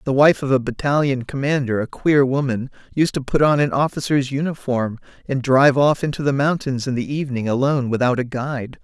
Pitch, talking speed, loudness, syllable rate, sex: 135 Hz, 195 wpm, -19 LUFS, 5.8 syllables/s, male